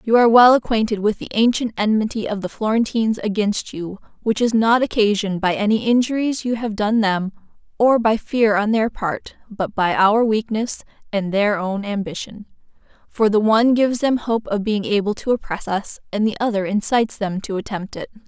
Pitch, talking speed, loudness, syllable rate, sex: 215 Hz, 190 wpm, -19 LUFS, 5.3 syllables/s, female